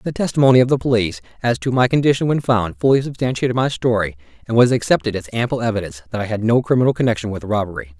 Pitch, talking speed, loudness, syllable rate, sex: 115 Hz, 225 wpm, -18 LUFS, 7.4 syllables/s, male